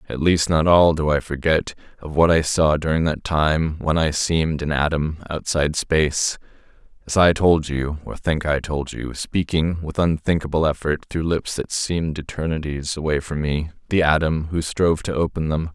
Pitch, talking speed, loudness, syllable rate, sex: 80 Hz, 185 wpm, -21 LUFS, 4.9 syllables/s, male